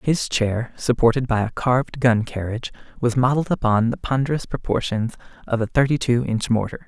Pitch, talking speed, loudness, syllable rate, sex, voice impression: 120 Hz, 165 wpm, -21 LUFS, 5.5 syllables/s, male, masculine, adult-like, relaxed, slightly weak, bright, soft, muffled, slightly halting, slightly refreshing, friendly, reassuring, kind, modest